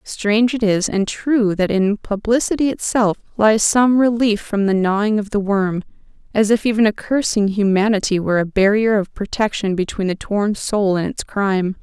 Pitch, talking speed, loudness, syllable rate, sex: 210 Hz, 180 wpm, -17 LUFS, 4.9 syllables/s, female